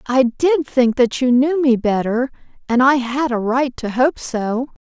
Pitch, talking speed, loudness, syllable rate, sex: 255 Hz, 195 wpm, -17 LUFS, 4.1 syllables/s, female